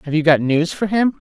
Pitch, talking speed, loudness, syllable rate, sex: 170 Hz, 280 wpm, -17 LUFS, 5.6 syllables/s, female